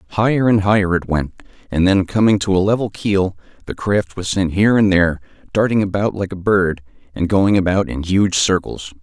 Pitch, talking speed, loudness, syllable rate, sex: 95 Hz, 200 wpm, -17 LUFS, 5.3 syllables/s, male